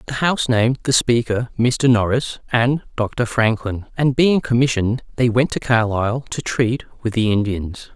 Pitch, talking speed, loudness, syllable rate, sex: 120 Hz, 165 wpm, -19 LUFS, 4.8 syllables/s, male